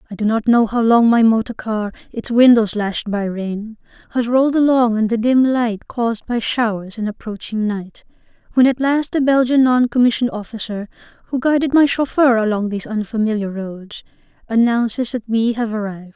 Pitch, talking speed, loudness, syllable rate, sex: 230 Hz, 175 wpm, -17 LUFS, 5.2 syllables/s, female